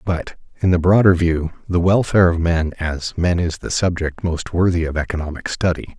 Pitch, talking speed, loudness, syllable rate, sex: 85 Hz, 190 wpm, -18 LUFS, 5.1 syllables/s, male